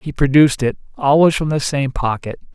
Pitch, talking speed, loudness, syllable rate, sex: 140 Hz, 165 wpm, -16 LUFS, 5.5 syllables/s, male